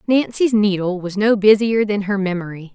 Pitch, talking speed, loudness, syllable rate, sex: 205 Hz, 175 wpm, -17 LUFS, 5.0 syllables/s, female